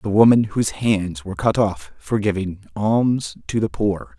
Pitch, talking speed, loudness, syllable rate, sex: 105 Hz, 185 wpm, -20 LUFS, 4.3 syllables/s, male